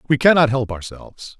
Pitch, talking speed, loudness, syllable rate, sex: 135 Hz, 170 wpm, -16 LUFS, 5.9 syllables/s, male